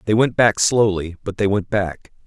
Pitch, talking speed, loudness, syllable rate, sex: 100 Hz, 210 wpm, -19 LUFS, 4.7 syllables/s, male